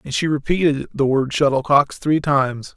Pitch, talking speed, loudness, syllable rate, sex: 140 Hz, 175 wpm, -18 LUFS, 5.1 syllables/s, male